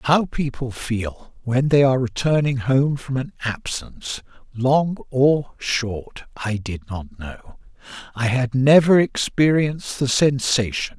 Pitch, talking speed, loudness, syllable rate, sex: 130 Hz, 130 wpm, -20 LUFS, 3.7 syllables/s, male